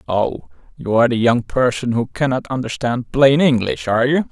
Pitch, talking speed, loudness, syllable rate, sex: 120 Hz, 180 wpm, -17 LUFS, 5.2 syllables/s, male